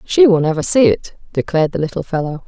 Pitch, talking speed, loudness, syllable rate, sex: 175 Hz, 220 wpm, -16 LUFS, 6.3 syllables/s, female